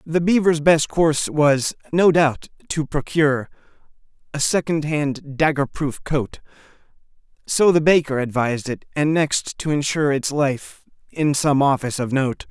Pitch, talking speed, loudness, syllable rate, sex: 145 Hz, 140 wpm, -20 LUFS, 4.5 syllables/s, male